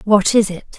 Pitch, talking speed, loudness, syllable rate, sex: 205 Hz, 230 wpm, -16 LUFS, 4.4 syllables/s, female